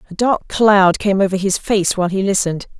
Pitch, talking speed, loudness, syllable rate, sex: 195 Hz, 215 wpm, -16 LUFS, 5.6 syllables/s, female